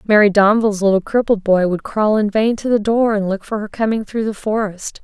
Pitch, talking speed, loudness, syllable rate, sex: 210 Hz, 240 wpm, -16 LUFS, 5.5 syllables/s, female